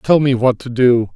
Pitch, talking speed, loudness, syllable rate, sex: 125 Hz, 260 wpm, -15 LUFS, 4.6 syllables/s, male